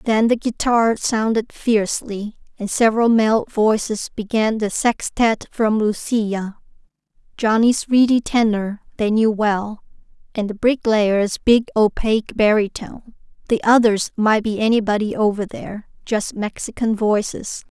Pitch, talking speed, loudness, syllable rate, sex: 220 Hz, 120 wpm, -18 LUFS, 4.3 syllables/s, female